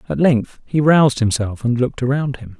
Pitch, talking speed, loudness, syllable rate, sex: 125 Hz, 210 wpm, -17 LUFS, 5.5 syllables/s, male